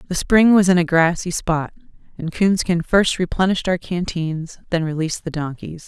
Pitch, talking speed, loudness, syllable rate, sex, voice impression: 175 Hz, 175 wpm, -19 LUFS, 5.1 syllables/s, female, feminine, adult-like, slightly cool, intellectual, calm